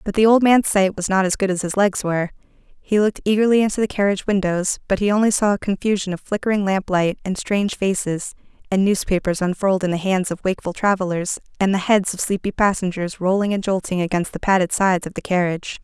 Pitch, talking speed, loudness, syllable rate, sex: 195 Hz, 215 wpm, -20 LUFS, 6.3 syllables/s, female